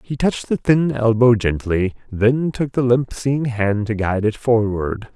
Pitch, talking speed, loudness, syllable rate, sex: 115 Hz, 185 wpm, -19 LUFS, 4.3 syllables/s, male